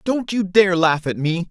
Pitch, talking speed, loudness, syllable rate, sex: 185 Hz, 240 wpm, -18 LUFS, 4.3 syllables/s, male